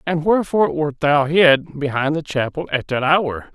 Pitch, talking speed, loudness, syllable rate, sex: 150 Hz, 185 wpm, -18 LUFS, 4.8 syllables/s, male